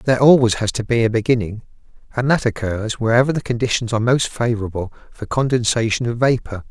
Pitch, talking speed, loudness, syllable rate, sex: 115 Hz, 180 wpm, -18 LUFS, 6.2 syllables/s, male